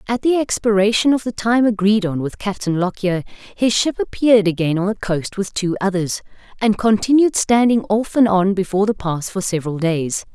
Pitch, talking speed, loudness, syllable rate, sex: 205 Hz, 190 wpm, -18 LUFS, 5.3 syllables/s, female